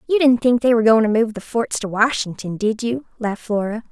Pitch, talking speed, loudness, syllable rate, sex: 225 Hz, 245 wpm, -19 LUFS, 5.9 syllables/s, female